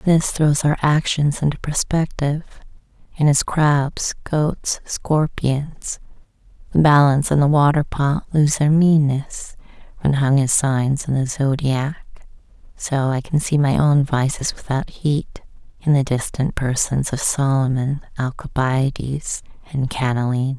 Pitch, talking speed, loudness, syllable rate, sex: 140 Hz, 130 wpm, -19 LUFS, 4.0 syllables/s, female